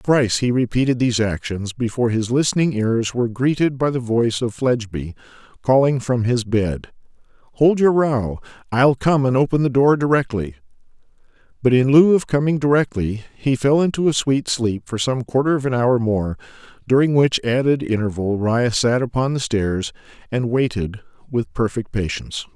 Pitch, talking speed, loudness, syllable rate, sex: 125 Hz, 165 wpm, -19 LUFS, 5.2 syllables/s, male